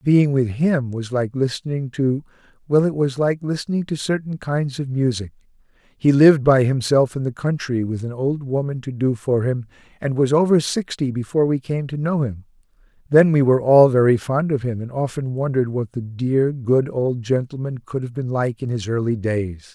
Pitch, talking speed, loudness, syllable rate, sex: 135 Hz, 200 wpm, -20 LUFS, 5.1 syllables/s, male